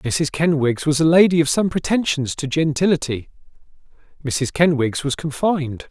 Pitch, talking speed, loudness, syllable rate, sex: 150 Hz, 140 wpm, -19 LUFS, 4.9 syllables/s, male